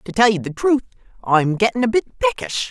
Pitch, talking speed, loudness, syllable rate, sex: 205 Hz, 220 wpm, -19 LUFS, 5.9 syllables/s, female